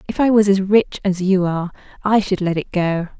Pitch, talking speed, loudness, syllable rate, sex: 190 Hz, 245 wpm, -18 LUFS, 5.4 syllables/s, female